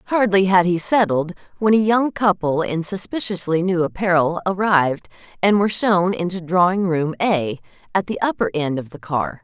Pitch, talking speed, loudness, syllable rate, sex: 180 Hz, 170 wpm, -19 LUFS, 5.1 syllables/s, female